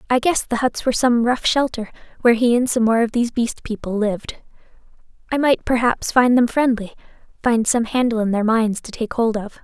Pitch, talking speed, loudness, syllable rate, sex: 235 Hz, 210 wpm, -19 LUFS, 5.7 syllables/s, female